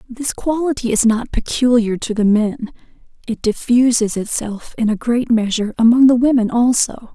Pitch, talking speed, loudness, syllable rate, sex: 235 Hz, 160 wpm, -16 LUFS, 4.9 syllables/s, female